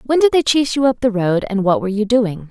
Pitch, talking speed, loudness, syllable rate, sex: 230 Hz, 310 wpm, -16 LUFS, 6.2 syllables/s, female